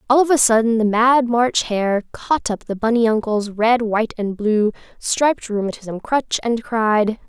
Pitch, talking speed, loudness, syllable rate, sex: 225 Hz, 180 wpm, -18 LUFS, 4.4 syllables/s, female